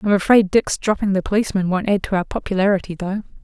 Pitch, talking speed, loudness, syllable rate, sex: 195 Hz, 210 wpm, -19 LUFS, 6.8 syllables/s, female